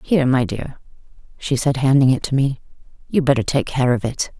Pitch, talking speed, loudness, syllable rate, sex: 135 Hz, 205 wpm, -19 LUFS, 5.6 syllables/s, female